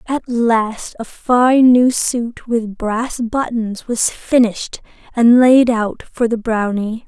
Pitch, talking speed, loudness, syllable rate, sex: 235 Hz, 145 wpm, -15 LUFS, 3.2 syllables/s, female